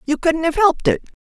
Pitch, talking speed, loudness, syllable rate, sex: 325 Hz, 245 wpm, -17 LUFS, 6.5 syllables/s, female